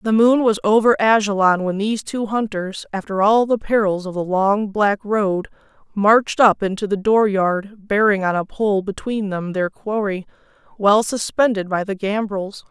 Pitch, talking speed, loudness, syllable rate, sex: 205 Hz, 170 wpm, -18 LUFS, 4.6 syllables/s, female